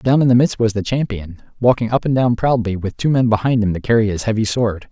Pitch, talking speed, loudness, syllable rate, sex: 115 Hz, 270 wpm, -17 LUFS, 5.9 syllables/s, male